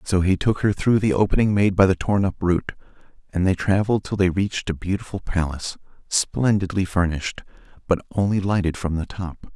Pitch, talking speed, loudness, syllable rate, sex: 95 Hz, 190 wpm, -22 LUFS, 5.6 syllables/s, male